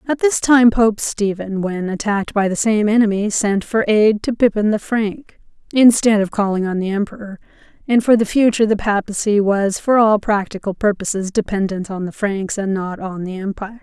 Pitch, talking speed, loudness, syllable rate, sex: 210 Hz, 190 wpm, -17 LUFS, 5.1 syllables/s, female